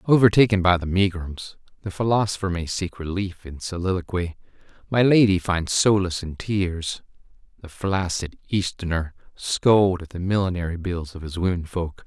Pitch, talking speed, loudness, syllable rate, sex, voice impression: 90 Hz, 145 wpm, -23 LUFS, 4.9 syllables/s, male, masculine, middle-aged, slightly thick, tensed, powerful, slightly bright, slightly clear, slightly fluent, slightly intellectual, slightly calm, mature, friendly, reassuring, wild, slightly kind, modest